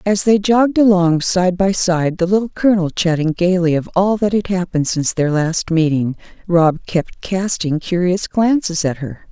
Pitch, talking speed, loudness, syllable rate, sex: 180 Hz, 180 wpm, -16 LUFS, 4.8 syllables/s, female